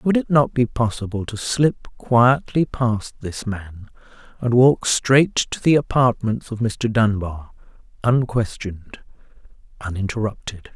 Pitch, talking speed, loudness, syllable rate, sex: 115 Hz, 125 wpm, -20 LUFS, 4.0 syllables/s, male